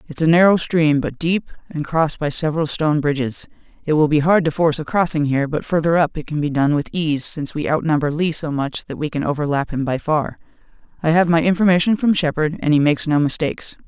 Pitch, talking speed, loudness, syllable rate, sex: 155 Hz, 235 wpm, -18 LUFS, 6.1 syllables/s, female